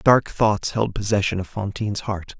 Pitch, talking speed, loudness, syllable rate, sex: 105 Hz, 175 wpm, -22 LUFS, 4.9 syllables/s, male